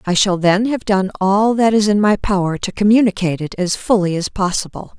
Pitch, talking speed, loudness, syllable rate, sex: 200 Hz, 215 wpm, -16 LUFS, 5.3 syllables/s, female